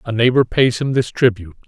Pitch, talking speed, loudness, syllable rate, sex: 115 Hz, 215 wpm, -16 LUFS, 6.0 syllables/s, male